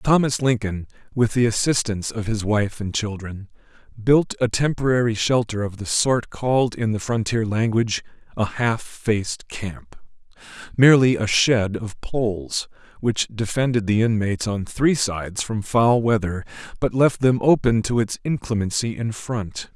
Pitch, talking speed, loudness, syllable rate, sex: 110 Hz, 150 wpm, -21 LUFS, 4.6 syllables/s, male